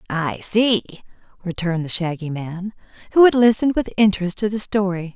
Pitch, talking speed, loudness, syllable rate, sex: 195 Hz, 165 wpm, -19 LUFS, 5.6 syllables/s, female